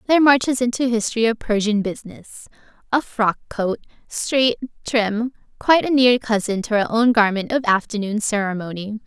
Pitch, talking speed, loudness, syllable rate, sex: 225 Hz, 145 wpm, -19 LUFS, 5.3 syllables/s, female